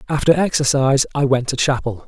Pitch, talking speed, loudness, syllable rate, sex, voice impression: 140 Hz, 175 wpm, -17 LUFS, 6.1 syllables/s, male, masculine, adult-like, slightly thick, fluent, cool, slightly refreshing, sincere, slightly kind